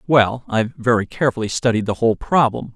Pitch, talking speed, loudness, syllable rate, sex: 115 Hz, 155 wpm, -19 LUFS, 6.4 syllables/s, male